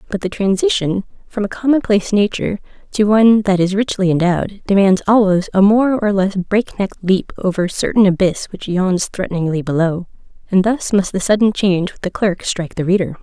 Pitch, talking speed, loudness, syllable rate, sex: 195 Hz, 185 wpm, -16 LUFS, 5.6 syllables/s, female